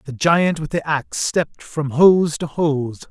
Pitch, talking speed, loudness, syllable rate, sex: 155 Hz, 195 wpm, -18 LUFS, 3.6 syllables/s, male